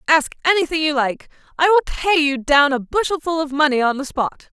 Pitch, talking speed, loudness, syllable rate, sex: 300 Hz, 210 wpm, -18 LUFS, 5.5 syllables/s, female